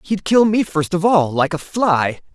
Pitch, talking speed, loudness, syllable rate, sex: 175 Hz, 230 wpm, -17 LUFS, 4.2 syllables/s, male